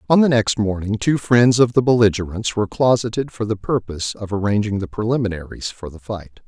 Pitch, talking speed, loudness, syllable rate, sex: 105 Hz, 205 wpm, -19 LUFS, 5.7 syllables/s, male